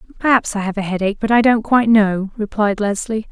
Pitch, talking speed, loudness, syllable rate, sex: 210 Hz, 215 wpm, -17 LUFS, 6.3 syllables/s, female